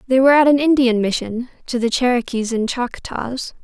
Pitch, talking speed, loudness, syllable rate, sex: 245 Hz, 165 wpm, -18 LUFS, 5.2 syllables/s, female